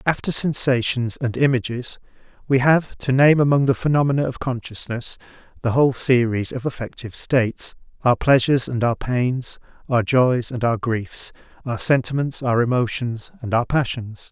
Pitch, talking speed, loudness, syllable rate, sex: 125 Hz, 145 wpm, -20 LUFS, 4.9 syllables/s, male